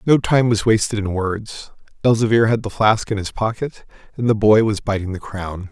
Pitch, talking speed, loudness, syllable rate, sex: 105 Hz, 210 wpm, -18 LUFS, 5.0 syllables/s, male